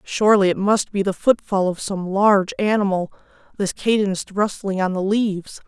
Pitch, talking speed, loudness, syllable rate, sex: 200 Hz, 170 wpm, -20 LUFS, 5.1 syllables/s, female